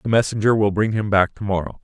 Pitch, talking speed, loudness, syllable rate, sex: 105 Hz, 260 wpm, -19 LUFS, 6.2 syllables/s, male